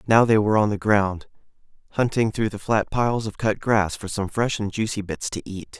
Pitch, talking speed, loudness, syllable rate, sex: 105 Hz, 230 wpm, -22 LUFS, 5.3 syllables/s, male